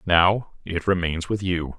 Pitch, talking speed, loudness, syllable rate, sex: 90 Hz, 170 wpm, -23 LUFS, 3.8 syllables/s, male